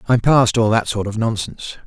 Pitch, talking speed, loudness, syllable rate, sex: 115 Hz, 225 wpm, -17 LUFS, 5.6 syllables/s, male